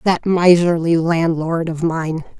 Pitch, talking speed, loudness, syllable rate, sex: 165 Hz, 125 wpm, -16 LUFS, 4.2 syllables/s, female